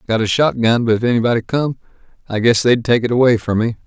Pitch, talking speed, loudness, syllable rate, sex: 115 Hz, 235 wpm, -16 LUFS, 6.4 syllables/s, male